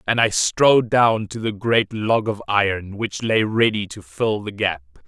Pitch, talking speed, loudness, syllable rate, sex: 105 Hz, 200 wpm, -20 LUFS, 4.3 syllables/s, male